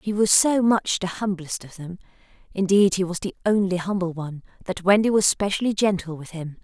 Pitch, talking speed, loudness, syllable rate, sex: 190 Hz, 200 wpm, -22 LUFS, 5.5 syllables/s, female